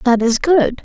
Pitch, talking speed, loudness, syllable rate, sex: 260 Hz, 215 wpm, -14 LUFS, 3.9 syllables/s, female